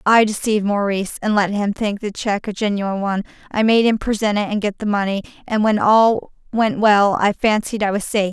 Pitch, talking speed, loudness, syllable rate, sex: 205 Hz, 225 wpm, -18 LUFS, 5.6 syllables/s, female